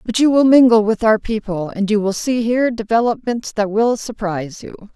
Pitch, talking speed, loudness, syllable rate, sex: 220 Hz, 205 wpm, -16 LUFS, 5.2 syllables/s, female